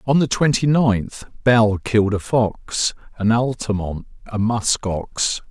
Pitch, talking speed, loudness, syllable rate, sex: 110 Hz, 140 wpm, -19 LUFS, 3.6 syllables/s, male